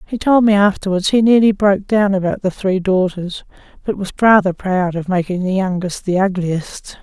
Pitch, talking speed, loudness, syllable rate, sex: 190 Hz, 190 wpm, -16 LUFS, 5.0 syllables/s, female